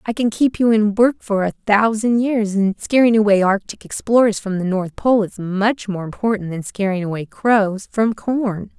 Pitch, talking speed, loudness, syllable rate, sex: 210 Hz, 200 wpm, -18 LUFS, 4.6 syllables/s, female